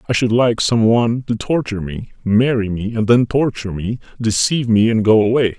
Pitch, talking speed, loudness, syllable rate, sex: 115 Hz, 205 wpm, -16 LUFS, 5.6 syllables/s, male